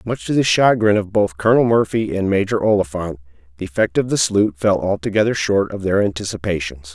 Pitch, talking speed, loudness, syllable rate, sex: 100 Hz, 190 wpm, -18 LUFS, 6.1 syllables/s, male